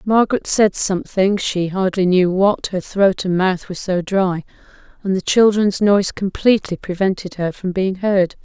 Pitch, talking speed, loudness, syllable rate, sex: 190 Hz, 170 wpm, -17 LUFS, 4.8 syllables/s, female